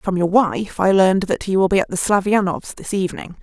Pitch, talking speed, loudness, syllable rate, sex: 190 Hz, 245 wpm, -18 LUFS, 5.6 syllables/s, female